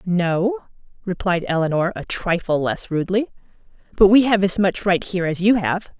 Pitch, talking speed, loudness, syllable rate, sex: 190 Hz, 170 wpm, -19 LUFS, 5.1 syllables/s, female